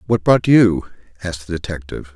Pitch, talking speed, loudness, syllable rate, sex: 95 Hz, 165 wpm, -17 LUFS, 6.1 syllables/s, male